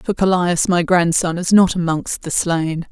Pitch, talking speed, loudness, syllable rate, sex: 175 Hz, 185 wpm, -17 LUFS, 4.3 syllables/s, female